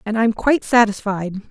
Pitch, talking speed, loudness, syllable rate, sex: 220 Hz, 160 wpm, -18 LUFS, 5.3 syllables/s, female